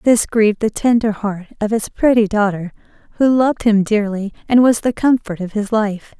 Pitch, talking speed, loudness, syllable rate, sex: 215 Hz, 195 wpm, -16 LUFS, 5.1 syllables/s, female